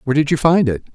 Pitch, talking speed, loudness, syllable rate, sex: 145 Hz, 315 wpm, -16 LUFS, 8.2 syllables/s, male